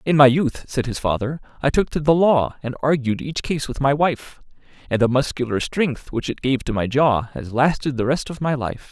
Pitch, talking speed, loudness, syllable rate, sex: 135 Hz, 235 wpm, -20 LUFS, 5.1 syllables/s, male